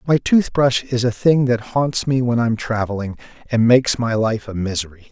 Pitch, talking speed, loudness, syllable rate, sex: 120 Hz, 210 wpm, -18 LUFS, 4.9 syllables/s, male